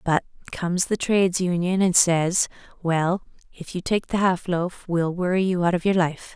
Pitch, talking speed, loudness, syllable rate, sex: 180 Hz, 200 wpm, -23 LUFS, 4.7 syllables/s, female